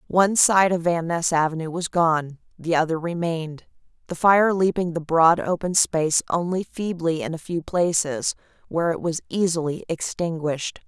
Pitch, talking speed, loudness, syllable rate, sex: 170 Hz, 160 wpm, -22 LUFS, 4.9 syllables/s, female